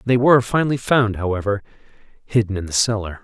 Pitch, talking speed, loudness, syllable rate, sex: 110 Hz, 165 wpm, -19 LUFS, 6.4 syllables/s, male